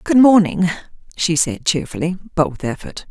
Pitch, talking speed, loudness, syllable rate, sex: 170 Hz, 155 wpm, -17 LUFS, 5.2 syllables/s, female